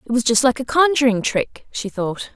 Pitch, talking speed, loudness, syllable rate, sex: 240 Hz, 230 wpm, -19 LUFS, 5.0 syllables/s, female